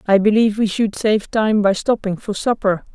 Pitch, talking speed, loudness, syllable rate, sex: 210 Hz, 205 wpm, -18 LUFS, 5.1 syllables/s, female